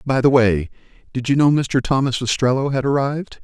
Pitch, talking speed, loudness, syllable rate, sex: 130 Hz, 190 wpm, -18 LUFS, 5.6 syllables/s, male